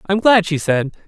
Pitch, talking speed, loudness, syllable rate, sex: 180 Hz, 225 wpm, -16 LUFS, 5.1 syllables/s, male